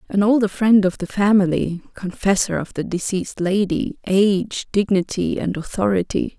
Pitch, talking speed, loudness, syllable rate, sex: 195 Hz, 120 wpm, -19 LUFS, 4.9 syllables/s, female